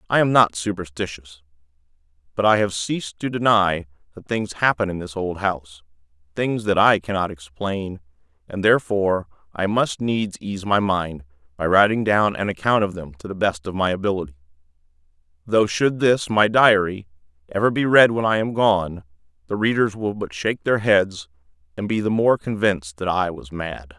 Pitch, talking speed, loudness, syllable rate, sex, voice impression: 95 Hz, 175 wpm, -21 LUFS, 5.1 syllables/s, male, masculine, adult-like, slightly thick, cool, slightly sincere, slightly friendly